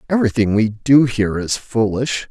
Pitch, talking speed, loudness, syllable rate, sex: 115 Hz, 155 wpm, -17 LUFS, 5.2 syllables/s, male